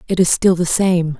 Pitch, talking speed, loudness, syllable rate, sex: 170 Hz, 250 wpm, -15 LUFS, 5.0 syllables/s, female